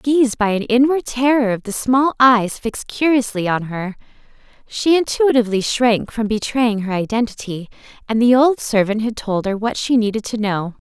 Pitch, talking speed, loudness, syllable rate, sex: 230 Hz, 175 wpm, -17 LUFS, 5.0 syllables/s, female